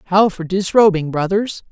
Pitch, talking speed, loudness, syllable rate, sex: 190 Hz, 140 wpm, -16 LUFS, 4.9 syllables/s, female